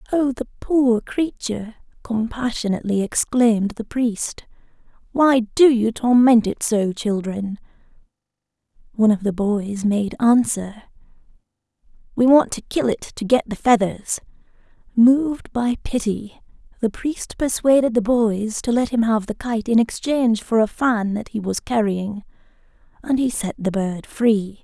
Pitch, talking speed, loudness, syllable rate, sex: 230 Hz, 140 wpm, -20 LUFS, 4.3 syllables/s, female